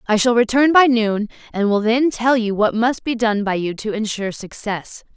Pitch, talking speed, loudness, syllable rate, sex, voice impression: 225 Hz, 220 wpm, -18 LUFS, 4.9 syllables/s, female, slightly feminine, slightly adult-like, clear, refreshing, slightly unique, lively